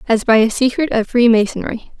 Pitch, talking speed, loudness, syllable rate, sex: 230 Hz, 180 wpm, -15 LUFS, 5.6 syllables/s, female